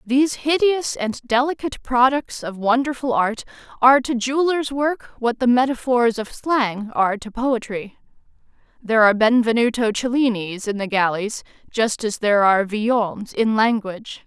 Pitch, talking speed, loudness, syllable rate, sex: 235 Hz, 145 wpm, -20 LUFS, 5.0 syllables/s, female